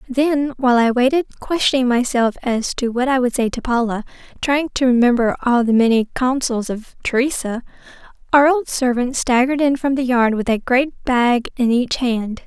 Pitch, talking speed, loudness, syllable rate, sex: 250 Hz, 185 wpm, -17 LUFS, 5.0 syllables/s, female